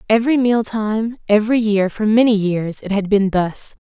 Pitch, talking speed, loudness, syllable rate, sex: 215 Hz, 175 wpm, -17 LUFS, 5.1 syllables/s, female